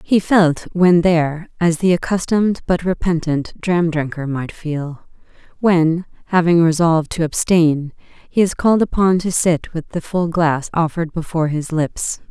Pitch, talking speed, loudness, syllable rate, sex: 165 Hz, 155 wpm, -17 LUFS, 4.4 syllables/s, female